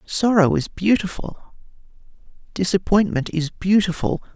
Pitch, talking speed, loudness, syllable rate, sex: 180 Hz, 85 wpm, -20 LUFS, 4.5 syllables/s, male